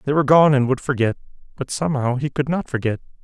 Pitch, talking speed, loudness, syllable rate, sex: 135 Hz, 220 wpm, -19 LUFS, 6.8 syllables/s, male